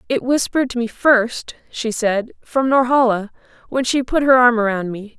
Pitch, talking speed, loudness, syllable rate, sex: 240 Hz, 175 wpm, -17 LUFS, 4.8 syllables/s, female